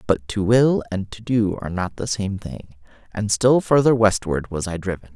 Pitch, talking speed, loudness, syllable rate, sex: 100 Hz, 210 wpm, -20 LUFS, 4.8 syllables/s, male